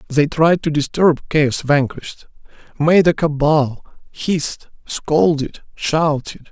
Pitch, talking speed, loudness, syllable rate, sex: 150 Hz, 110 wpm, -17 LUFS, 3.6 syllables/s, male